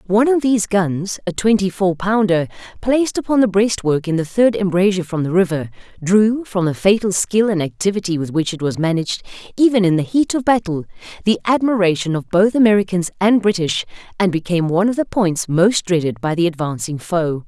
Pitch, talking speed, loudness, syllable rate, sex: 190 Hz, 190 wpm, -17 LUFS, 5.7 syllables/s, female